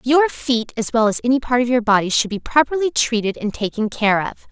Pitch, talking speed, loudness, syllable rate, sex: 235 Hz, 240 wpm, -18 LUFS, 5.7 syllables/s, female